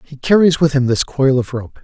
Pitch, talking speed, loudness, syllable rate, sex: 135 Hz, 260 wpm, -15 LUFS, 5.2 syllables/s, male